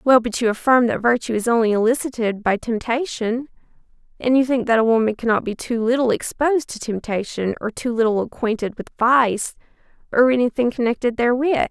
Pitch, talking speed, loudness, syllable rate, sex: 235 Hz, 170 wpm, -20 LUFS, 5.7 syllables/s, female